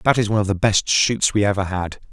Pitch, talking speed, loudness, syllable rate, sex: 100 Hz, 285 wpm, -19 LUFS, 6.3 syllables/s, male